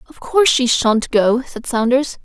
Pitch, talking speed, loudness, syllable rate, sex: 250 Hz, 190 wpm, -16 LUFS, 4.5 syllables/s, female